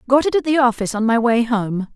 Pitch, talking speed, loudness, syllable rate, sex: 240 Hz, 275 wpm, -17 LUFS, 6.4 syllables/s, female